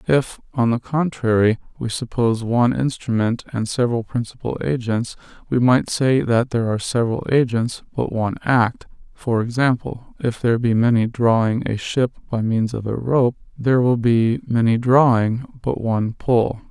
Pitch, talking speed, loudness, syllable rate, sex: 120 Hz, 160 wpm, -20 LUFS, 4.9 syllables/s, male